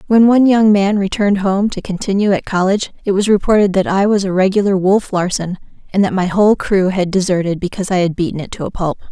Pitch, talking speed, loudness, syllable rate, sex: 195 Hz, 230 wpm, -15 LUFS, 6.3 syllables/s, female